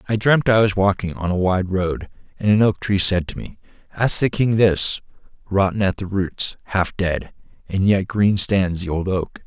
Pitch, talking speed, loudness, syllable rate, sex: 95 Hz, 210 wpm, -19 LUFS, 4.5 syllables/s, male